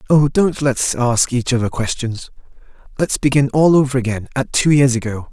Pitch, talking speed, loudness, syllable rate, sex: 130 Hz, 170 wpm, -16 LUFS, 5.0 syllables/s, male